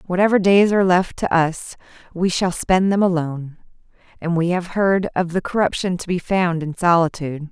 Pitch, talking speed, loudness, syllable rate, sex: 180 Hz, 185 wpm, -19 LUFS, 5.2 syllables/s, female